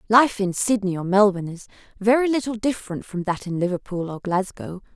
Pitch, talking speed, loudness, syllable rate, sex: 200 Hz, 180 wpm, -22 LUFS, 5.8 syllables/s, female